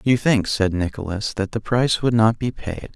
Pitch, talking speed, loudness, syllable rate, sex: 110 Hz, 225 wpm, -21 LUFS, 5.0 syllables/s, male